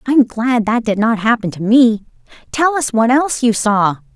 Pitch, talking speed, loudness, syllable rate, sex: 235 Hz, 215 wpm, -14 LUFS, 5.0 syllables/s, female